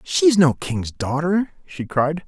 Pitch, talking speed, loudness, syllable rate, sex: 150 Hz, 185 wpm, -20 LUFS, 3.9 syllables/s, male